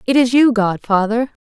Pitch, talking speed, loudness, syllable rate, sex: 235 Hz, 170 wpm, -15 LUFS, 4.9 syllables/s, female